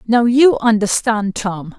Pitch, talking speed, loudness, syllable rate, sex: 220 Hz, 135 wpm, -15 LUFS, 3.6 syllables/s, female